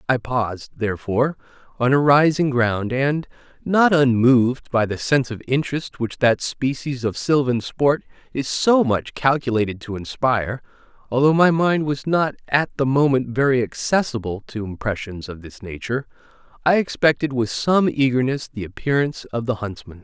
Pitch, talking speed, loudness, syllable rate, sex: 130 Hz, 155 wpm, -20 LUFS, 3.7 syllables/s, male